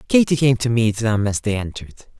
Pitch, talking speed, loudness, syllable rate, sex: 120 Hz, 220 wpm, -19 LUFS, 6.1 syllables/s, male